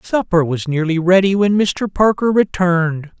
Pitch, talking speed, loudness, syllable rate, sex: 180 Hz, 150 wpm, -16 LUFS, 4.6 syllables/s, male